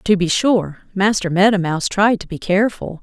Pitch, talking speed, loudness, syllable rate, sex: 195 Hz, 200 wpm, -17 LUFS, 5.3 syllables/s, female